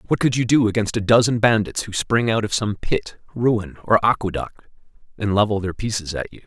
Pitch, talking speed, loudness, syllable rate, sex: 105 Hz, 215 wpm, -20 LUFS, 5.4 syllables/s, male